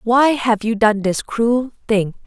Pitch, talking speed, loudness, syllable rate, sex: 230 Hz, 185 wpm, -17 LUFS, 3.6 syllables/s, female